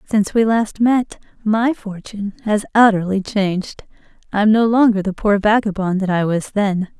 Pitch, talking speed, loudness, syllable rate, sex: 205 Hz, 170 wpm, -17 LUFS, 4.9 syllables/s, female